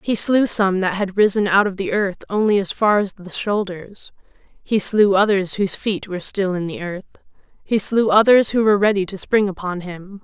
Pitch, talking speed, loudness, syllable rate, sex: 200 Hz, 210 wpm, -18 LUFS, 5.1 syllables/s, female